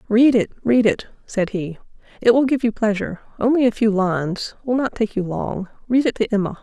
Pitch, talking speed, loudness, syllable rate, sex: 220 Hz, 210 wpm, -20 LUFS, 5.5 syllables/s, female